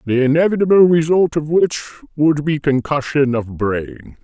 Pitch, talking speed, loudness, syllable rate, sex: 150 Hz, 140 wpm, -16 LUFS, 4.8 syllables/s, male